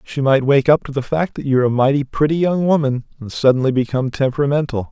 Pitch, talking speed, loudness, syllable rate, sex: 135 Hz, 220 wpm, -17 LUFS, 6.4 syllables/s, male